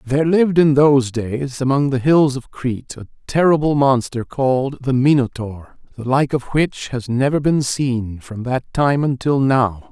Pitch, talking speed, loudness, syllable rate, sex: 135 Hz, 175 wpm, -17 LUFS, 4.6 syllables/s, male